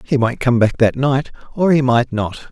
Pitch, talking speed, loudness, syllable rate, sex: 125 Hz, 240 wpm, -16 LUFS, 4.7 syllables/s, male